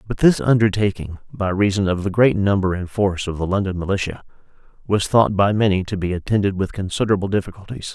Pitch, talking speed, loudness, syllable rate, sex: 100 Hz, 190 wpm, -19 LUFS, 6.2 syllables/s, male